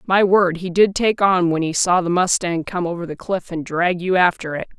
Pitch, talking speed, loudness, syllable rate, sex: 180 Hz, 250 wpm, -18 LUFS, 5.0 syllables/s, female